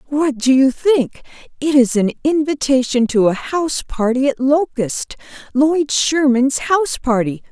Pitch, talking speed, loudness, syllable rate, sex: 270 Hz, 145 wpm, -16 LUFS, 4.2 syllables/s, female